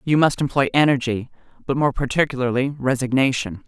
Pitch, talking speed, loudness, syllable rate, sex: 130 Hz, 130 wpm, -20 LUFS, 5.7 syllables/s, female